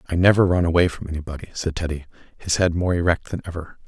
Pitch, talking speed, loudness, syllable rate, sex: 85 Hz, 215 wpm, -21 LUFS, 6.8 syllables/s, male